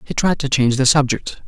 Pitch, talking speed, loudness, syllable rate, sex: 135 Hz, 245 wpm, -17 LUFS, 6.3 syllables/s, male